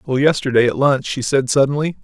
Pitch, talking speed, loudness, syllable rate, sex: 135 Hz, 205 wpm, -16 LUFS, 5.9 syllables/s, male